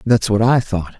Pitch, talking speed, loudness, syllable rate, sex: 110 Hz, 240 wpm, -16 LUFS, 4.6 syllables/s, male